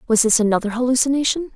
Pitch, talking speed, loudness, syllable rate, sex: 245 Hz, 155 wpm, -18 LUFS, 7.3 syllables/s, female